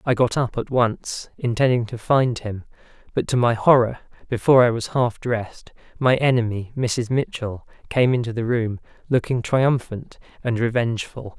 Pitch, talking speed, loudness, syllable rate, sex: 120 Hz, 160 wpm, -21 LUFS, 4.8 syllables/s, male